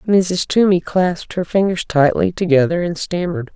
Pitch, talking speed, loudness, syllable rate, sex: 175 Hz, 150 wpm, -17 LUFS, 5.1 syllables/s, female